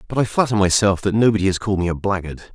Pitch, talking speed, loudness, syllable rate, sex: 100 Hz, 260 wpm, -18 LUFS, 7.5 syllables/s, male